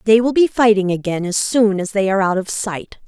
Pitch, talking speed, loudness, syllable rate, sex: 205 Hz, 255 wpm, -17 LUFS, 5.6 syllables/s, female